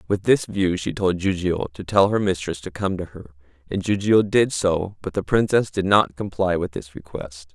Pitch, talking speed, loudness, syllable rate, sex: 90 Hz, 215 wpm, -22 LUFS, 4.8 syllables/s, male